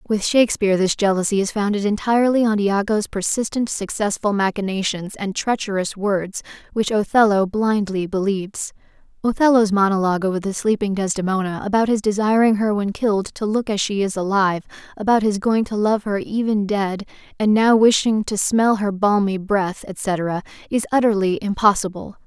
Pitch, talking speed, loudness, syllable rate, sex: 205 Hz, 155 wpm, -19 LUFS, 5.3 syllables/s, female